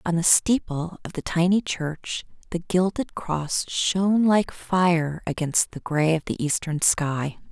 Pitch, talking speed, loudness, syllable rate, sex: 170 Hz, 160 wpm, -23 LUFS, 3.8 syllables/s, female